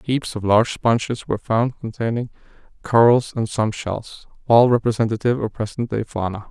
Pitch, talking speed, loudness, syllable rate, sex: 115 Hz, 155 wpm, -20 LUFS, 5.3 syllables/s, male